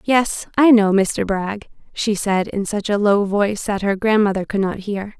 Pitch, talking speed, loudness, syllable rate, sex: 205 Hz, 210 wpm, -18 LUFS, 4.5 syllables/s, female